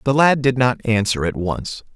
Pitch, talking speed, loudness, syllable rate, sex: 120 Hz, 215 wpm, -18 LUFS, 4.6 syllables/s, male